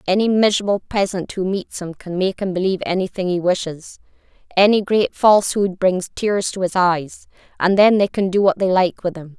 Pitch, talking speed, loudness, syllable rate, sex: 190 Hz, 200 wpm, -18 LUFS, 5.3 syllables/s, female